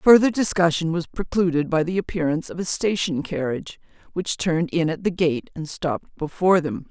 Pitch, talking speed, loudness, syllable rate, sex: 170 Hz, 180 wpm, -22 LUFS, 5.7 syllables/s, female